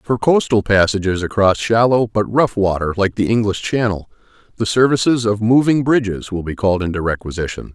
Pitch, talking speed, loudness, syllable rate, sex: 110 Hz, 170 wpm, -16 LUFS, 5.4 syllables/s, male